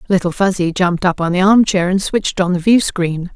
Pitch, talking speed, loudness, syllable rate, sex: 185 Hz, 215 wpm, -15 LUFS, 5.7 syllables/s, female